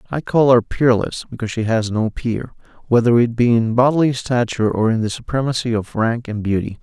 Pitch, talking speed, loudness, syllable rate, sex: 120 Hz, 200 wpm, -18 LUFS, 5.7 syllables/s, male